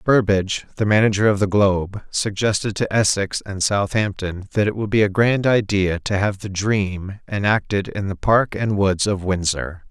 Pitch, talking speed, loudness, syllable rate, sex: 100 Hz, 180 wpm, -20 LUFS, 4.7 syllables/s, male